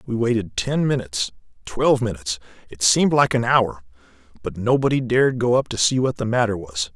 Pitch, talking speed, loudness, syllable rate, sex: 110 Hz, 190 wpm, -20 LUFS, 5.9 syllables/s, male